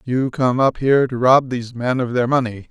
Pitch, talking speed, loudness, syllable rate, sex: 125 Hz, 245 wpm, -18 LUFS, 5.4 syllables/s, male